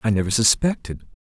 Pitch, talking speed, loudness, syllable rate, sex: 110 Hz, 140 wpm, -19 LUFS, 6.2 syllables/s, male